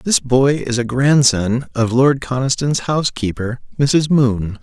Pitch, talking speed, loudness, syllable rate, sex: 130 Hz, 145 wpm, -16 LUFS, 4.0 syllables/s, male